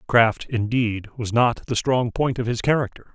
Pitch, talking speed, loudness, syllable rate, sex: 120 Hz, 190 wpm, -22 LUFS, 4.4 syllables/s, male